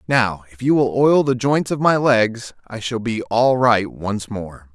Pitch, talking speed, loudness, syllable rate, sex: 115 Hz, 215 wpm, -18 LUFS, 3.9 syllables/s, male